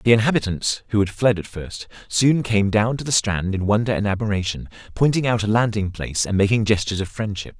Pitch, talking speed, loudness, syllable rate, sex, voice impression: 105 Hz, 215 wpm, -21 LUFS, 5.9 syllables/s, male, masculine, adult-like, tensed, powerful, bright, clear, cool, intellectual, friendly, wild, lively, slightly intense